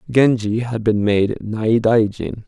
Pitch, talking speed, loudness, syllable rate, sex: 110 Hz, 120 wpm, -18 LUFS, 3.5 syllables/s, male